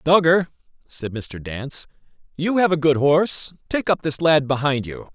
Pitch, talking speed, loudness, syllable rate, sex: 150 Hz, 175 wpm, -20 LUFS, 4.7 syllables/s, male